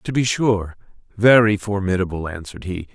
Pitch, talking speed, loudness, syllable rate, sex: 100 Hz, 120 wpm, -19 LUFS, 5.2 syllables/s, male